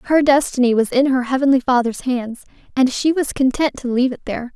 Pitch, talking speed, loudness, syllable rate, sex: 260 Hz, 210 wpm, -18 LUFS, 5.8 syllables/s, female